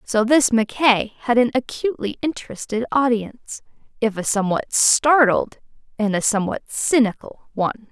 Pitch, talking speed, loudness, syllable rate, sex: 230 Hz, 130 wpm, -19 LUFS, 5.0 syllables/s, female